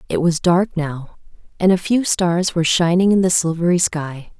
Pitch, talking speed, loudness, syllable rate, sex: 175 Hz, 190 wpm, -17 LUFS, 4.9 syllables/s, female